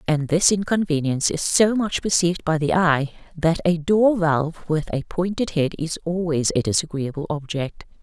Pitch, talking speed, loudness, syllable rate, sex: 165 Hz, 170 wpm, -21 LUFS, 4.9 syllables/s, female